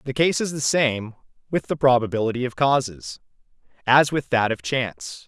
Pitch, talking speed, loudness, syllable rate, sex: 120 Hz, 170 wpm, -22 LUFS, 5.1 syllables/s, male